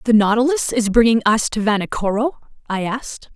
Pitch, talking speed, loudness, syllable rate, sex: 225 Hz, 160 wpm, -18 LUFS, 5.6 syllables/s, female